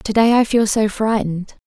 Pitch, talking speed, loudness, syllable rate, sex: 215 Hz, 180 wpm, -17 LUFS, 5.2 syllables/s, female